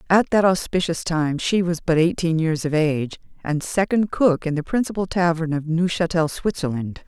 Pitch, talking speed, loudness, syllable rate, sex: 170 Hz, 180 wpm, -21 LUFS, 5.0 syllables/s, female